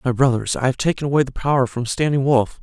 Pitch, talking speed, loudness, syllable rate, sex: 130 Hz, 250 wpm, -19 LUFS, 6.3 syllables/s, male